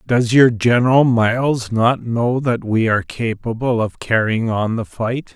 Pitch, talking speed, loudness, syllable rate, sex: 115 Hz, 170 wpm, -17 LUFS, 4.2 syllables/s, male